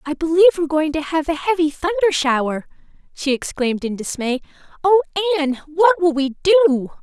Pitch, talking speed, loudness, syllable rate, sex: 320 Hz, 170 wpm, -18 LUFS, 5.5 syllables/s, female